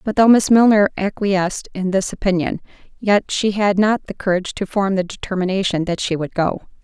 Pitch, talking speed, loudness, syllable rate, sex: 195 Hz, 195 wpm, -18 LUFS, 5.5 syllables/s, female